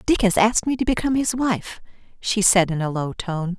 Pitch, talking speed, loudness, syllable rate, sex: 205 Hz, 235 wpm, -21 LUFS, 5.5 syllables/s, female